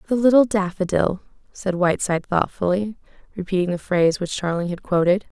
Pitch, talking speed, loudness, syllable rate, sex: 190 Hz, 145 wpm, -21 LUFS, 5.9 syllables/s, female